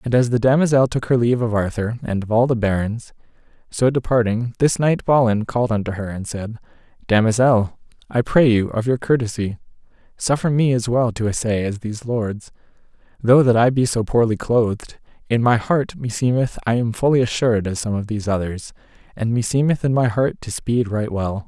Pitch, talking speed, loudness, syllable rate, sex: 115 Hz, 195 wpm, -19 LUFS, 5.4 syllables/s, male